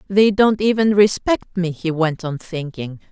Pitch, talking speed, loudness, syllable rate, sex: 185 Hz, 175 wpm, -18 LUFS, 4.2 syllables/s, female